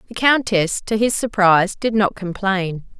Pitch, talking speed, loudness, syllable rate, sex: 200 Hz, 160 wpm, -18 LUFS, 4.6 syllables/s, female